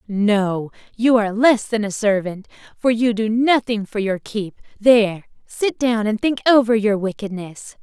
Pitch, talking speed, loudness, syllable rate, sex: 220 Hz, 170 wpm, -18 LUFS, 4.4 syllables/s, female